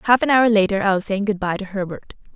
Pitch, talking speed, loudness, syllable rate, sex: 205 Hz, 280 wpm, -19 LUFS, 6.4 syllables/s, female